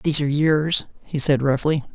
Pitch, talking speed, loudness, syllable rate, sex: 145 Hz, 185 wpm, -20 LUFS, 5.4 syllables/s, female